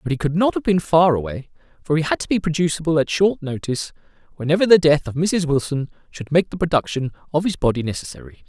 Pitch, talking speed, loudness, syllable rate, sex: 155 Hz, 220 wpm, -20 LUFS, 6.3 syllables/s, male